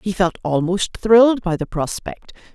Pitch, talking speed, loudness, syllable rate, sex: 195 Hz, 165 wpm, -18 LUFS, 4.4 syllables/s, female